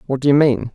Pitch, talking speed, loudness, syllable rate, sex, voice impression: 135 Hz, 320 wpm, -15 LUFS, 6.8 syllables/s, male, masculine, slightly young, slightly adult-like, thick, slightly relaxed, weak, slightly dark, slightly hard, slightly muffled, fluent, slightly raspy, cool, slightly intellectual, slightly mature, slightly friendly, very unique, wild, slightly sweet